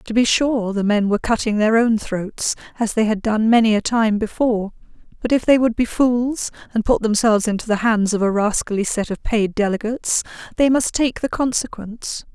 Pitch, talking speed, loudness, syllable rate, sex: 225 Hz, 205 wpm, -19 LUFS, 5.3 syllables/s, female